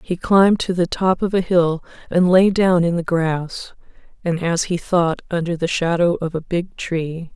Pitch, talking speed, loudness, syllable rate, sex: 175 Hz, 205 wpm, -19 LUFS, 4.4 syllables/s, female